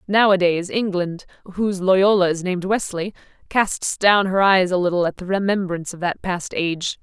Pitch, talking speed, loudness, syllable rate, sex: 185 Hz, 170 wpm, -20 LUFS, 5.2 syllables/s, female